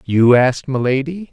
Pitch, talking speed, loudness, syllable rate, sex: 135 Hz, 135 wpm, -15 LUFS, 5.0 syllables/s, male